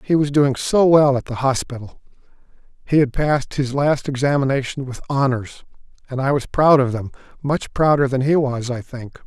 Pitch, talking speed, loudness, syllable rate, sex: 135 Hz, 190 wpm, -19 LUFS, 5.1 syllables/s, male